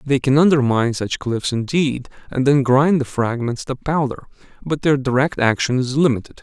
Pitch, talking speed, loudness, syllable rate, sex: 135 Hz, 175 wpm, -18 LUFS, 5.1 syllables/s, male